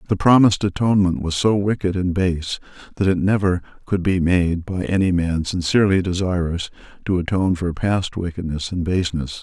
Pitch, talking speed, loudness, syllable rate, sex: 90 Hz, 165 wpm, -20 LUFS, 5.5 syllables/s, male